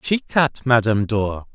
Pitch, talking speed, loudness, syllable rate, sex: 120 Hz, 155 wpm, -19 LUFS, 4.4 syllables/s, male